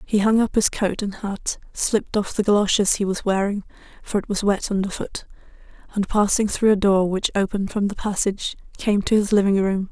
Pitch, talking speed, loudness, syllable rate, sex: 200 Hz, 205 wpm, -21 LUFS, 5.0 syllables/s, female